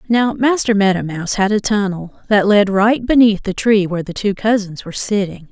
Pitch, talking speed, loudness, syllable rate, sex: 205 Hz, 205 wpm, -16 LUFS, 5.4 syllables/s, female